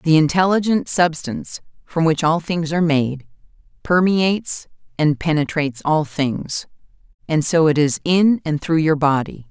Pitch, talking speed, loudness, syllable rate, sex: 160 Hz, 145 wpm, -18 LUFS, 4.5 syllables/s, female